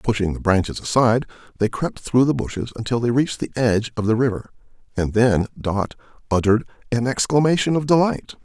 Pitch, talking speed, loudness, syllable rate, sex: 120 Hz, 180 wpm, -20 LUFS, 6.1 syllables/s, male